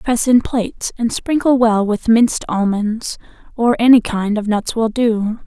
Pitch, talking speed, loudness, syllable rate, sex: 225 Hz, 175 wpm, -16 LUFS, 4.3 syllables/s, female